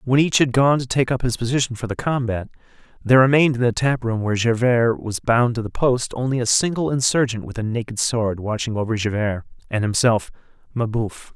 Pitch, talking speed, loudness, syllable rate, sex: 120 Hz, 205 wpm, -20 LUFS, 5.8 syllables/s, male